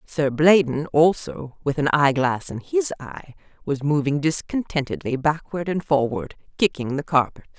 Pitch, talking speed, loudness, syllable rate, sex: 145 Hz, 140 wpm, -22 LUFS, 4.6 syllables/s, female